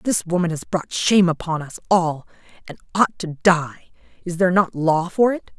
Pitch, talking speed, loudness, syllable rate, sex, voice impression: 175 Hz, 195 wpm, -20 LUFS, 4.9 syllables/s, female, feminine, very adult-like, slightly fluent, intellectual, slightly strict